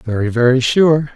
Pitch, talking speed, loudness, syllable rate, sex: 130 Hz, 155 wpm, -14 LUFS, 4.6 syllables/s, male